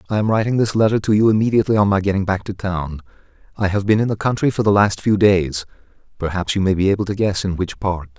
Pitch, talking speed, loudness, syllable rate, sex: 100 Hz, 255 wpm, -18 LUFS, 6.6 syllables/s, male